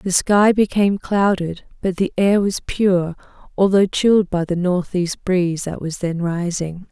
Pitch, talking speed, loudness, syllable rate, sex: 185 Hz, 165 wpm, -18 LUFS, 4.3 syllables/s, female